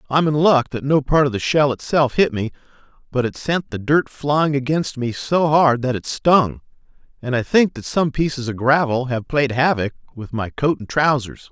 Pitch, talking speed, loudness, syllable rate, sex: 135 Hz, 215 wpm, -19 LUFS, 4.8 syllables/s, male